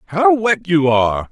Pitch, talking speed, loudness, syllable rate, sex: 145 Hz, 180 wpm, -15 LUFS, 4.7 syllables/s, male